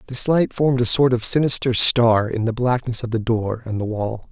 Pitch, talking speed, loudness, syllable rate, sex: 120 Hz, 235 wpm, -19 LUFS, 5.2 syllables/s, male